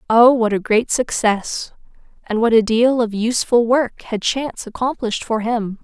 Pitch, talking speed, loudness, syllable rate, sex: 230 Hz, 175 wpm, -18 LUFS, 4.7 syllables/s, female